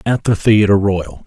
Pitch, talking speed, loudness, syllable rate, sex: 100 Hz, 190 wpm, -14 LUFS, 4.4 syllables/s, male